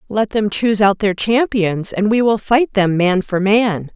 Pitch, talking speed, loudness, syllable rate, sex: 205 Hz, 215 wpm, -16 LUFS, 4.3 syllables/s, female